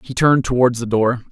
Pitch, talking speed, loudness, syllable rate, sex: 120 Hz, 230 wpm, -17 LUFS, 6.1 syllables/s, male